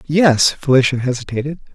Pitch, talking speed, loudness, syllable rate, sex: 140 Hz, 105 wpm, -15 LUFS, 5.4 syllables/s, male